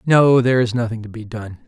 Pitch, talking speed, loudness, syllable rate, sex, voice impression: 120 Hz, 250 wpm, -16 LUFS, 6.1 syllables/s, male, very masculine, very adult-like, very middle-aged, very thick, tensed, very powerful, bright, soft, clear, fluent, cool, very intellectual, very sincere, very calm, very mature, friendly, reassuring, slightly elegant, sweet, slightly lively, kind, slightly modest